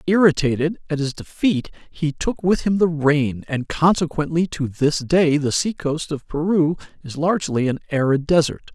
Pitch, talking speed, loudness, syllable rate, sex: 155 Hz, 170 wpm, -20 LUFS, 4.8 syllables/s, male